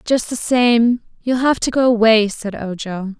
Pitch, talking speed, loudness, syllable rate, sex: 230 Hz, 190 wpm, -17 LUFS, 4.1 syllables/s, female